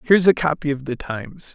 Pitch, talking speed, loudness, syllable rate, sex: 150 Hz, 270 wpm, -20 LUFS, 7.2 syllables/s, male